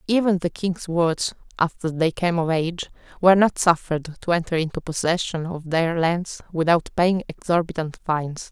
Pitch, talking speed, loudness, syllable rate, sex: 170 Hz, 160 wpm, -22 LUFS, 5.1 syllables/s, female